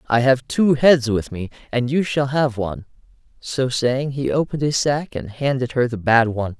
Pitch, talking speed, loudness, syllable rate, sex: 130 Hz, 210 wpm, -20 LUFS, 5.0 syllables/s, male